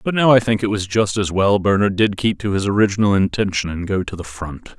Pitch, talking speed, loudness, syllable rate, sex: 100 Hz, 265 wpm, -18 LUFS, 5.8 syllables/s, male